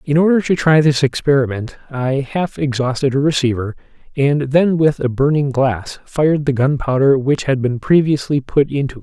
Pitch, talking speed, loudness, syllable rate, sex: 140 Hz, 180 wpm, -16 LUFS, 5.0 syllables/s, male